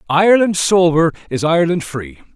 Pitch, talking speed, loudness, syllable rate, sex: 165 Hz, 125 wpm, -14 LUFS, 5.3 syllables/s, male